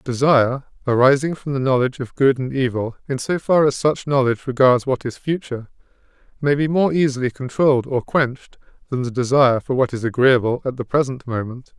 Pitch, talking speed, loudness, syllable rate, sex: 130 Hz, 190 wpm, -19 LUFS, 5.8 syllables/s, male